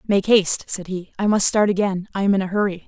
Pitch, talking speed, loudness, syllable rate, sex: 195 Hz, 270 wpm, -20 LUFS, 6.3 syllables/s, female